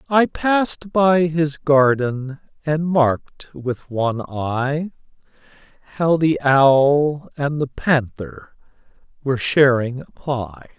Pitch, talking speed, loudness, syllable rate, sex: 145 Hz, 110 wpm, -19 LUFS, 3.2 syllables/s, male